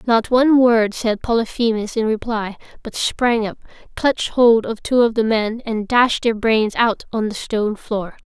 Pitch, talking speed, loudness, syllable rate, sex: 225 Hz, 190 wpm, -18 LUFS, 4.5 syllables/s, female